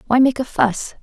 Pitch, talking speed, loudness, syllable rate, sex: 225 Hz, 235 wpm, -18 LUFS, 5.0 syllables/s, female